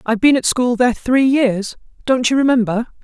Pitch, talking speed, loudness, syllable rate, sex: 245 Hz, 200 wpm, -15 LUFS, 5.6 syllables/s, female